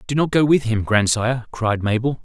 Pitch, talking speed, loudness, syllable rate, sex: 120 Hz, 215 wpm, -19 LUFS, 5.4 syllables/s, male